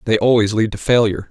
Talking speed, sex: 230 wpm, male